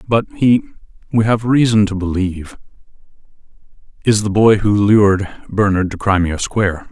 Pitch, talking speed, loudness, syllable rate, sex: 100 Hz, 120 wpm, -15 LUFS, 5.0 syllables/s, male